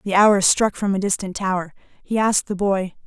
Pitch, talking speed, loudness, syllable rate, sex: 195 Hz, 215 wpm, -20 LUFS, 5.5 syllables/s, female